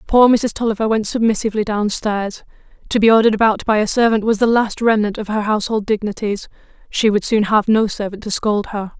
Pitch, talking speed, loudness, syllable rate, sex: 215 Hz, 195 wpm, -17 LUFS, 5.9 syllables/s, female